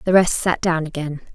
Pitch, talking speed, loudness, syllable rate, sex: 165 Hz, 225 wpm, -20 LUFS, 5.0 syllables/s, female